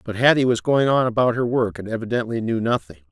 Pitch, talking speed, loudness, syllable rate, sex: 120 Hz, 230 wpm, -20 LUFS, 6.2 syllables/s, male